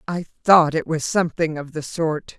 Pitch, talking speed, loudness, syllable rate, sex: 160 Hz, 200 wpm, -20 LUFS, 4.9 syllables/s, female